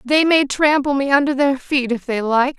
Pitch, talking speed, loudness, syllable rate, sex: 275 Hz, 230 wpm, -17 LUFS, 4.8 syllables/s, female